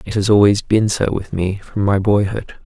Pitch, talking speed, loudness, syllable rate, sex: 100 Hz, 220 wpm, -16 LUFS, 4.8 syllables/s, male